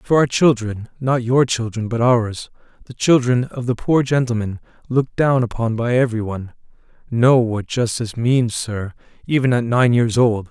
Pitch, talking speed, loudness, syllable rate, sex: 120 Hz, 155 wpm, -18 LUFS, 4.9 syllables/s, male